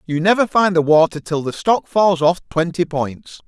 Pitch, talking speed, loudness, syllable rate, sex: 170 Hz, 205 wpm, -17 LUFS, 4.6 syllables/s, male